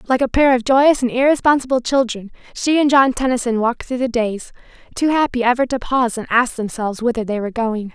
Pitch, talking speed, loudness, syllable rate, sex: 245 Hz, 210 wpm, -17 LUFS, 6.0 syllables/s, female